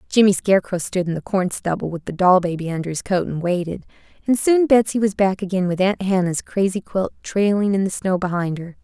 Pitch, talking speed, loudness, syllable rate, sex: 190 Hz, 225 wpm, -20 LUFS, 5.7 syllables/s, female